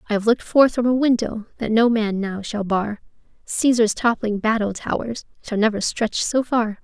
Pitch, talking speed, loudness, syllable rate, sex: 225 Hz, 195 wpm, -20 LUFS, 5.0 syllables/s, female